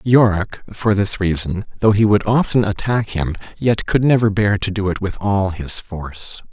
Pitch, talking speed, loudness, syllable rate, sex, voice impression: 100 Hz, 185 wpm, -18 LUFS, 4.5 syllables/s, male, masculine, adult-like, tensed, hard, cool, intellectual, refreshing, sincere, calm, slightly friendly, slightly wild, slightly kind